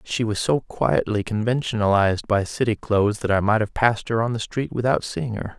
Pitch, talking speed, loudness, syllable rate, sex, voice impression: 110 Hz, 215 wpm, -22 LUFS, 5.5 syllables/s, male, masculine, adult-like, cool, sincere, slightly calm, slightly friendly